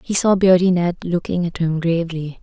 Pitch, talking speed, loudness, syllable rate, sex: 175 Hz, 200 wpm, -18 LUFS, 5.3 syllables/s, female